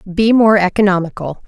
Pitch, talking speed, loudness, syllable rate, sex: 195 Hz, 120 wpm, -13 LUFS, 5.2 syllables/s, female